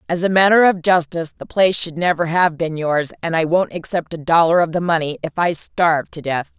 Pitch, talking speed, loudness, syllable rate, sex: 165 Hz, 235 wpm, -17 LUFS, 5.7 syllables/s, female